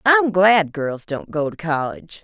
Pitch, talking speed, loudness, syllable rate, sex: 175 Hz, 190 wpm, -19 LUFS, 4.2 syllables/s, female